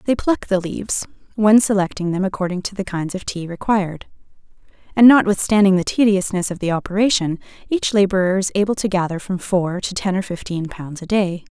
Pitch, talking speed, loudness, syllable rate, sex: 190 Hz, 185 wpm, -19 LUFS, 5.8 syllables/s, female